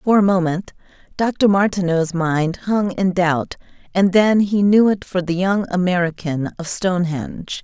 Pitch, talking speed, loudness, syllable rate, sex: 185 Hz, 155 wpm, -18 LUFS, 4.3 syllables/s, female